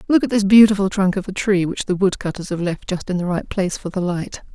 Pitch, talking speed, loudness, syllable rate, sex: 190 Hz, 290 wpm, -19 LUFS, 6.1 syllables/s, female